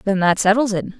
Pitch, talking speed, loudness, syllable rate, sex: 200 Hz, 240 wpm, -17 LUFS, 6.0 syllables/s, female